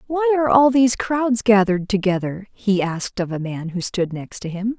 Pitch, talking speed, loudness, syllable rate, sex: 215 Hz, 200 wpm, -20 LUFS, 5.1 syllables/s, female